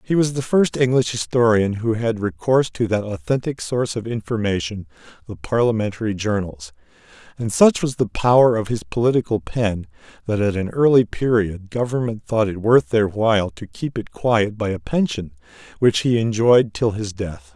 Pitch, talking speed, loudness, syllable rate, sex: 115 Hz, 175 wpm, -20 LUFS, 5.1 syllables/s, male